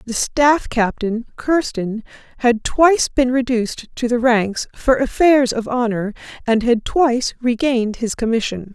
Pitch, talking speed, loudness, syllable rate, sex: 240 Hz, 145 wpm, -18 LUFS, 4.4 syllables/s, female